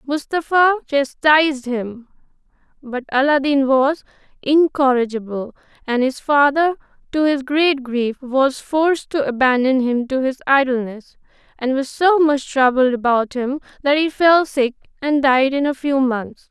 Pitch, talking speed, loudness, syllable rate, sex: 270 Hz, 140 wpm, -17 LUFS, 4.2 syllables/s, female